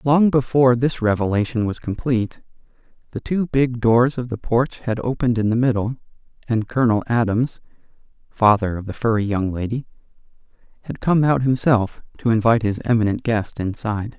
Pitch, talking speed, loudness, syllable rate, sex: 120 Hz, 155 wpm, -20 LUFS, 4.9 syllables/s, male